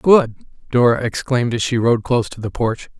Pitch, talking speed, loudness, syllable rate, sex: 120 Hz, 200 wpm, -18 LUFS, 5.5 syllables/s, male